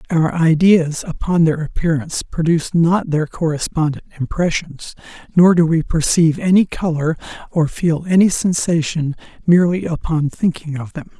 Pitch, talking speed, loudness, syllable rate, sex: 160 Hz, 135 wpm, -17 LUFS, 4.9 syllables/s, male